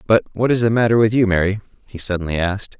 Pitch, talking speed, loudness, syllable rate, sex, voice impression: 105 Hz, 235 wpm, -18 LUFS, 7.0 syllables/s, male, masculine, very adult-like, cool, slightly intellectual, calm, slightly sweet